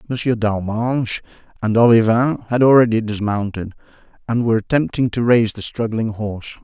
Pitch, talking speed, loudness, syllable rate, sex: 115 Hz, 135 wpm, -18 LUFS, 5.6 syllables/s, male